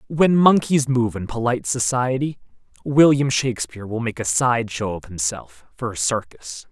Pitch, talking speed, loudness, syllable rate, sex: 115 Hz, 160 wpm, -20 LUFS, 4.8 syllables/s, male